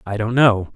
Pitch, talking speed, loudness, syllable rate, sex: 110 Hz, 235 wpm, -17 LUFS, 4.9 syllables/s, male